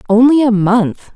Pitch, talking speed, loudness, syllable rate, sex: 225 Hz, 155 wpm, -12 LUFS, 4.3 syllables/s, female